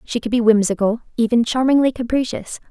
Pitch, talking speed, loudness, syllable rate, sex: 235 Hz, 135 wpm, -18 LUFS, 5.9 syllables/s, female